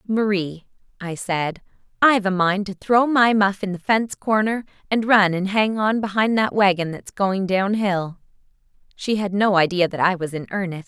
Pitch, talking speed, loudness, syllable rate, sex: 195 Hz, 195 wpm, -20 LUFS, 4.8 syllables/s, female